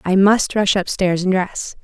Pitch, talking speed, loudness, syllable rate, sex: 190 Hz, 195 wpm, -17 LUFS, 4.1 syllables/s, female